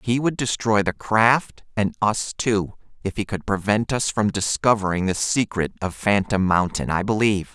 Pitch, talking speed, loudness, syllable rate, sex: 105 Hz, 175 wpm, -22 LUFS, 4.7 syllables/s, male